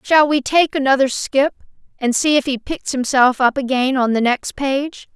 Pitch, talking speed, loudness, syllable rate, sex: 270 Hz, 200 wpm, -17 LUFS, 4.6 syllables/s, female